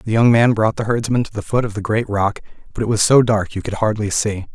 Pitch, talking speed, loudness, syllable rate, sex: 110 Hz, 290 wpm, -17 LUFS, 5.8 syllables/s, male